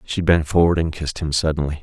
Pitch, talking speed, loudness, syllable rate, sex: 80 Hz, 230 wpm, -19 LUFS, 6.4 syllables/s, male